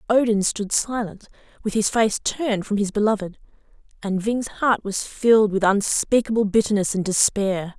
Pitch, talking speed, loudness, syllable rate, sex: 210 Hz, 160 wpm, -21 LUFS, 5.0 syllables/s, female